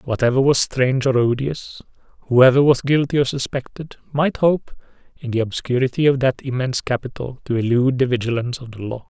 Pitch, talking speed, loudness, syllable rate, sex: 130 Hz, 170 wpm, -19 LUFS, 5.8 syllables/s, male